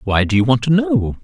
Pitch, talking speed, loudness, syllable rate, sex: 115 Hz, 290 wpm, -16 LUFS, 5.5 syllables/s, male